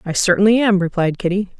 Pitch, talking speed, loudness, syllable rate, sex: 190 Hz, 190 wpm, -16 LUFS, 6.3 syllables/s, female